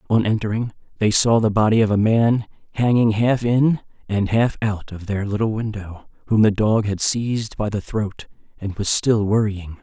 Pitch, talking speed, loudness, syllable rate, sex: 110 Hz, 190 wpm, -20 LUFS, 4.8 syllables/s, male